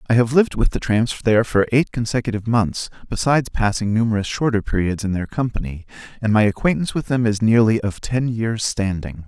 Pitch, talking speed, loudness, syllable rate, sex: 110 Hz, 195 wpm, -20 LUFS, 6.0 syllables/s, male